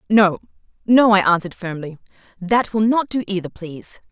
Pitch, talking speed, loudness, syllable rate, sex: 195 Hz, 160 wpm, -18 LUFS, 5.5 syllables/s, female